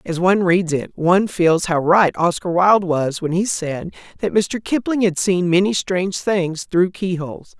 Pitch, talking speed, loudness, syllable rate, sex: 180 Hz, 190 wpm, -18 LUFS, 4.6 syllables/s, female